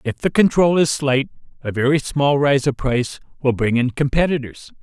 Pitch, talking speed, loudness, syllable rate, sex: 135 Hz, 185 wpm, -18 LUFS, 5.1 syllables/s, male